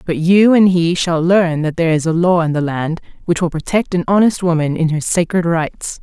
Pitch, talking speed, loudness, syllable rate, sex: 170 Hz, 240 wpm, -15 LUFS, 5.2 syllables/s, female